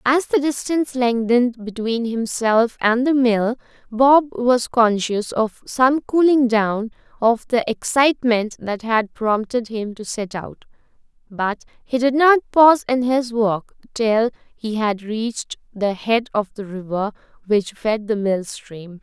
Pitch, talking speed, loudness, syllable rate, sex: 230 Hz, 150 wpm, -19 LUFS, 3.9 syllables/s, female